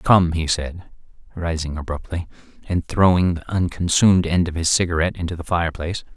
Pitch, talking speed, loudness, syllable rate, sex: 85 Hz, 155 wpm, -20 LUFS, 5.7 syllables/s, male